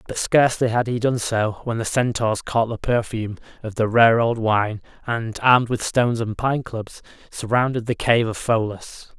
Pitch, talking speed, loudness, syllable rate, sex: 115 Hz, 190 wpm, -21 LUFS, 4.8 syllables/s, male